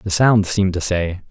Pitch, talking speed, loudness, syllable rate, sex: 95 Hz, 230 wpm, -17 LUFS, 5.0 syllables/s, male